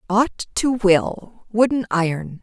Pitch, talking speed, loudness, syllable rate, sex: 210 Hz, 100 wpm, -20 LUFS, 3.4 syllables/s, female